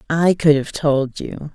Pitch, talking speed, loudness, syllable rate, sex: 150 Hz, 195 wpm, -17 LUFS, 3.7 syllables/s, female